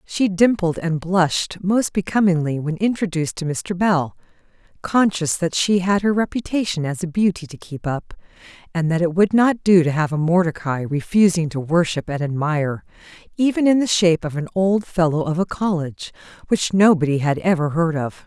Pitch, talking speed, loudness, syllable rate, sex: 175 Hz, 180 wpm, -19 LUFS, 5.2 syllables/s, female